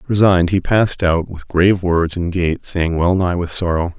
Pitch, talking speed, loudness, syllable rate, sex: 90 Hz, 195 wpm, -16 LUFS, 5.0 syllables/s, male